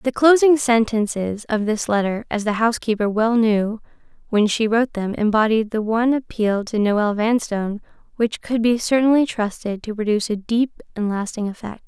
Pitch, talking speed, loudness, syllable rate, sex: 220 Hz, 160 wpm, -20 LUFS, 5.1 syllables/s, female